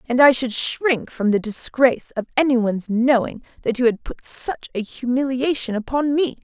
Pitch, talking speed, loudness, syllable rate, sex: 250 Hz, 175 wpm, -20 LUFS, 4.8 syllables/s, female